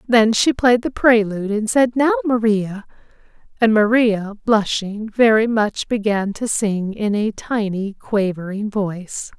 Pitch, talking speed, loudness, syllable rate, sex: 215 Hz, 140 wpm, -18 LUFS, 4.0 syllables/s, female